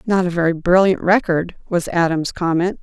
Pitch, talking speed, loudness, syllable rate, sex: 175 Hz, 170 wpm, -17 LUFS, 5.0 syllables/s, female